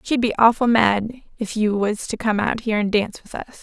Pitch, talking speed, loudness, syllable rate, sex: 220 Hz, 250 wpm, -20 LUFS, 5.5 syllables/s, female